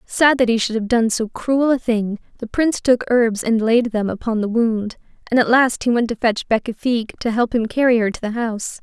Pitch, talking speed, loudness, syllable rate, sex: 230 Hz, 245 wpm, -18 LUFS, 5.3 syllables/s, female